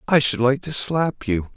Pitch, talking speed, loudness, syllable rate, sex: 130 Hz, 230 wpm, -21 LUFS, 4.3 syllables/s, male